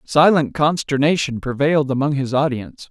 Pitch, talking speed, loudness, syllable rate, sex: 140 Hz, 125 wpm, -18 LUFS, 5.3 syllables/s, male